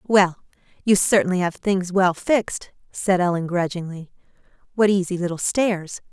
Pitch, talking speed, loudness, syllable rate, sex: 185 Hz, 135 wpm, -21 LUFS, 4.8 syllables/s, female